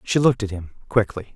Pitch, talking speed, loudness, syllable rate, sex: 105 Hz, 220 wpm, -22 LUFS, 6.4 syllables/s, male